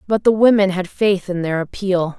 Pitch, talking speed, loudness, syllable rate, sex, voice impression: 190 Hz, 220 wpm, -17 LUFS, 4.9 syllables/s, female, feminine, adult-like, slightly fluent, intellectual, slightly calm, slightly strict